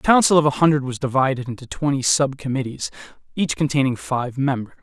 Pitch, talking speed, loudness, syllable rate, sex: 135 Hz, 175 wpm, -20 LUFS, 6.1 syllables/s, male